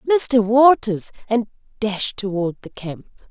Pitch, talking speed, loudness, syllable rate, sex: 225 Hz, 125 wpm, -19 LUFS, 4.3 syllables/s, female